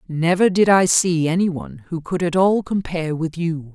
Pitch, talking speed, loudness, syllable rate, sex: 170 Hz, 190 wpm, -18 LUFS, 4.7 syllables/s, female